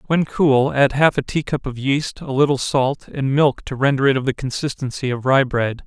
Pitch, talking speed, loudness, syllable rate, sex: 135 Hz, 235 wpm, -19 LUFS, 5.0 syllables/s, male